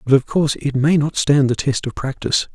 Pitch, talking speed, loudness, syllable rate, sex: 140 Hz, 260 wpm, -18 LUFS, 5.8 syllables/s, male